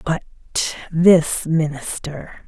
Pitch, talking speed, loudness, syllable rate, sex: 160 Hz, 75 wpm, -19 LUFS, 3.0 syllables/s, female